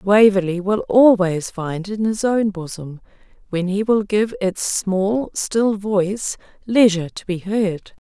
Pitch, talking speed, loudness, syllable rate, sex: 200 Hz, 150 wpm, -19 LUFS, 3.8 syllables/s, female